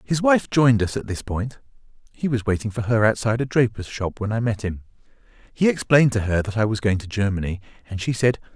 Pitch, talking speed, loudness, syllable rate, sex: 115 Hz, 230 wpm, -22 LUFS, 4.2 syllables/s, male